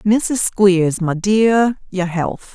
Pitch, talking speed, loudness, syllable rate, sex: 195 Hz, 140 wpm, -16 LUFS, 2.5 syllables/s, female